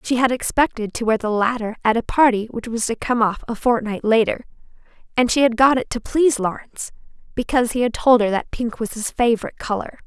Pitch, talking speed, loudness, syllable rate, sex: 230 Hz, 220 wpm, -19 LUFS, 6.1 syllables/s, female